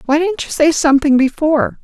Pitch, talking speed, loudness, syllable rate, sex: 300 Hz, 195 wpm, -14 LUFS, 5.9 syllables/s, female